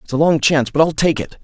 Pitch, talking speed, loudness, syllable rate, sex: 150 Hz, 335 wpm, -16 LUFS, 6.5 syllables/s, male